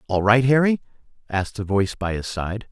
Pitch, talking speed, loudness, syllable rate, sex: 110 Hz, 200 wpm, -21 LUFS, 6.0 syllables/s, male